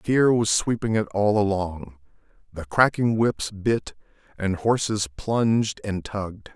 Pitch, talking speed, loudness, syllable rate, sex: 100 Hz, 135 wpm, -23 LUFS, 4.0 syllables/s, male